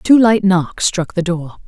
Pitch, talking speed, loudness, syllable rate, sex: 185 Hz, 215 wpm, -15 LUFS, 4.0 syllables/s, female